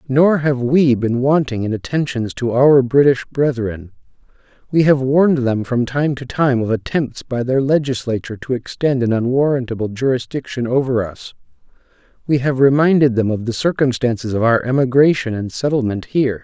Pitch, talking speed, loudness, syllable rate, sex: 130 Hz, 160 wpm, -17 LUFS, 5.2 syllables/s, male